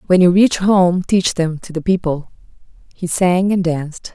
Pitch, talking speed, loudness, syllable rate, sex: 180 Hz, 190 wpm, -16 LUFS, 4.5 syllables/s, female